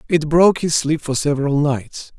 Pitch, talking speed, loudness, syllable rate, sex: 150 Hz, 190 wpm, -17 LUFS, 5.1 syllables/s, male